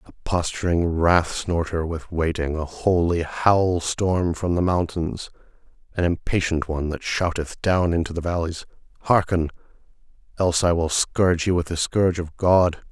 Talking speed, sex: 155 wpm, male